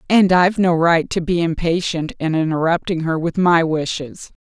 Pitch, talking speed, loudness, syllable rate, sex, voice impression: 165 Hz, 175 wpm, -17 LUFS, 4.9 syllables/s, female, feminine, middle-aged, slightly powerful, slightly intellectual, slightly strict, slightly sharp